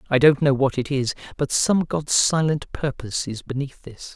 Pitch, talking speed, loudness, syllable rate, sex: 140 Hz, 200 wpm, -22 LUFS, 4.9 syllables/s, male